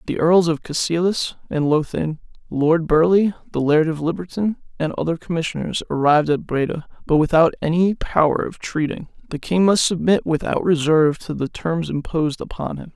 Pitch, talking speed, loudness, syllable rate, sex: 160 Hz, 165 wpm, -20 LUFS, 5.2 syllables/s, male